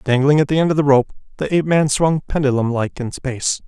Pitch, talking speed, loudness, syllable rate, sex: 140 Hz, 245 wpm, -17 LUFS, 6.2 syllables/s, male